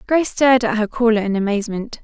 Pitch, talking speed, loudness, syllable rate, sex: 225 Hz, 205 wpm, -17 LUFS, 7.0 syllables/s, female